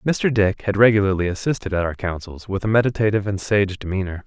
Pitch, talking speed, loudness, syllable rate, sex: 100 Hz, 195 wpm, -20 LUFS, 6.2 syllables/s, male